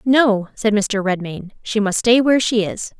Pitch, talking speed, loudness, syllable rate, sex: 215 Hz, 200 wpm, -17 LUFS, 4.4 syllables/s, female